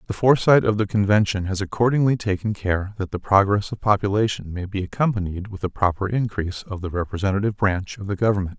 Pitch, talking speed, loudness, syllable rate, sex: 100 Hz, 195 wpm, -22 LUFS, 6.4 syllables/s, male